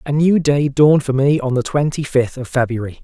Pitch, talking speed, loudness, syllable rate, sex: 135 Hz, 235 wpm, -16 LUFS, 5.5 syllables/s, male